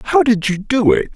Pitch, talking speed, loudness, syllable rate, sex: 195 Hz, 260 wpm, -15 LUFS, 6.1 syllables/s, male